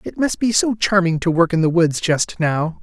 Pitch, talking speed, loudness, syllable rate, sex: 180 Hz, 255 wpm, -18 LUFS, 4.8 syllables/s, male